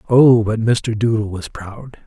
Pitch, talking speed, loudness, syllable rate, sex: 110 Hz, 175 wpm, -16 LUFS, 3.7 syllables/s, male